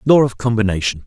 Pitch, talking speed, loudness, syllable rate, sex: 110 Hz, 170 wpm, -17 LUFS, 6.2 syllables/s, male